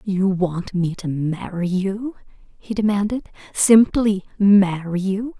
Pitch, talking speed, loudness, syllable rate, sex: 195 Hz, 110 wpm, -19 LUFS, 3.4 syllables/s, female